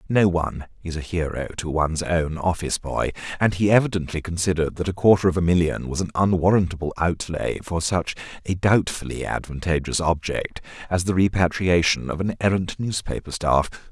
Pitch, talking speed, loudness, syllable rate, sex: 85 Hz, 165 wpm, -22 LUFS, 5.5 syllables/s, male